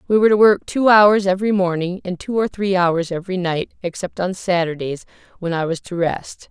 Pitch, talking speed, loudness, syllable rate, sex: 185 Hz, 210 wpm, -18 LUFS, 5.4 syllables/s, female